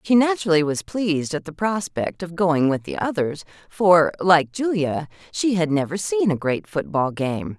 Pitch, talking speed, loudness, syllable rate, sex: 170 Hz, 180 wpm, -21 LUFS, 4.6 syllables/s, female